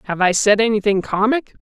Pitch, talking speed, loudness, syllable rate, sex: 210 Hz, 185 wpm, -17 LUFS, 5.8 syllables/s, female